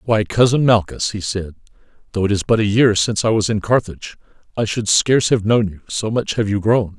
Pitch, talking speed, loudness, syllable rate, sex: 105 Hz, 230 wpm, -17 LUFS, 5.6 syllables/s, male